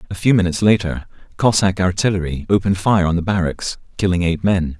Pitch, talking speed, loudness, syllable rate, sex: 90 Hz, 175 wpm, -18 LUFS, 6.1 syllables/s, male